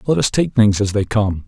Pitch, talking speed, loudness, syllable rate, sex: 110 Hz, 285 wpm, -17 LUFS, 5.2 syllables/s, male